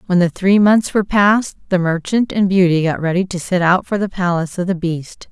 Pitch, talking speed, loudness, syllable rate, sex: 185 Hz, 235 wpm, -16 LUFS, 5.4 syllables/s, female